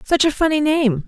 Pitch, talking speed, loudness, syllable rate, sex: 285 Hz, 225 wpm, -17 LUFS, 5.2 syllables/s, female